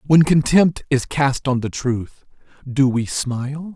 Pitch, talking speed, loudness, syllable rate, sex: 140 Hz, 160 wpm, -19 LUFS, 3.8 syllables/s, male